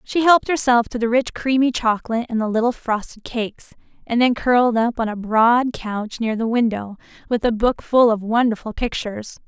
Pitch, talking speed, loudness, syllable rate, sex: 235 Hz, 195 wpm, -19 LUFS, 5.3 syllables/s, female